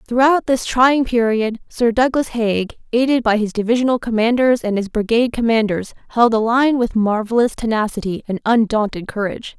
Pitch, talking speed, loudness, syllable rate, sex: 230 Hz, 155 wpm, -17 LUFS, 5.2 syllables/s, female